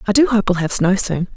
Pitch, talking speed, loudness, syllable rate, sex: 200 Hz, 310 wpm, -16 LUFS, 6.3 syllables/s, female